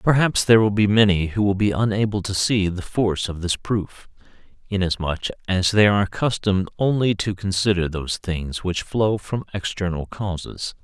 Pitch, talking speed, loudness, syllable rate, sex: 100 Hz, 170 wpm, -21 LUFS, 5.2 syllables/s, male